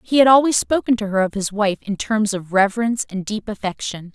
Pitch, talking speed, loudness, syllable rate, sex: 215 Hz, 230 wpm, -19 LUFS, 5.8 syllables/s, female